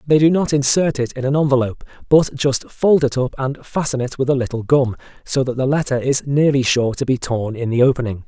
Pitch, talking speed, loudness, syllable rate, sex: 135 Hz, 240 wpm, -18 LUFS, 5.7 syllables/s, male